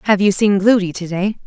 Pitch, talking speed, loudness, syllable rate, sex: 195 Hz, 245 wpm, -16 LUFS, 5.6 syllables/s, female